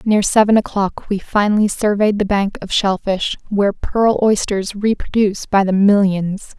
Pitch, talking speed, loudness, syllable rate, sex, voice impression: 205 Hz, 155 wpm, -16 LUFS, 4.6 syllables/s, female, feminine, adult-like, tensed, clear, slightly halting, intellectual, calm, friendly, kind, modest